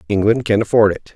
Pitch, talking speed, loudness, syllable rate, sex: 105 Hz, 205 wpm, -16 LUFS, 6.2 syllables/s, male